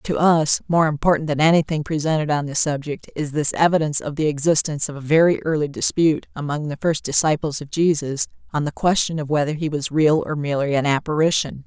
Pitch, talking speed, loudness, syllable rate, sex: 150 Hz, 200 wpm, -20 LUFS, 6.0 syllables/s, female